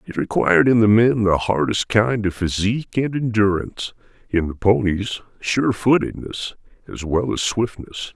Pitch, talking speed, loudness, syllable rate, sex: 105 Hz, 145 wpm, -19 LUFS, 4.8 syllables/s, male